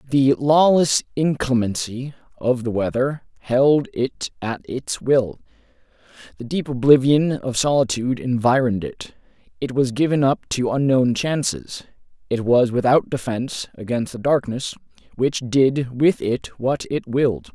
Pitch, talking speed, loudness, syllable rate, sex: 125 Hz, 135 wpm, -20 LUFS, 4.3 syllables/s, male